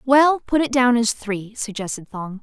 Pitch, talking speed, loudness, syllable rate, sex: 235 Hz, 200 wpm, -20 LUFS, 4.4 syllables/s, female